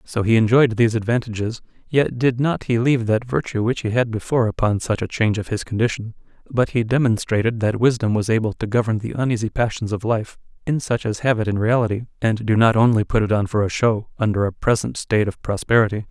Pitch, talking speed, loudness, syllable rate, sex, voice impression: 115 Hz, 225 wpm, -20 LUFS, 6.1 syllables/s, male, very masculine, very adult-like, middle-aged, thick, slightly relaxed, slightly weak, dark, slightly soft, muffled, slightly fluent, cool, very intellectual, very sincere, very calm, slightly mature, friendly, reassuring, slightly unique, elegant, sweet, very kind, very modest